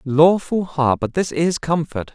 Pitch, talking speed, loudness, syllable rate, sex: 155 Hz, 170 wpm, -19 LUFS, 3.9 syllables/s, male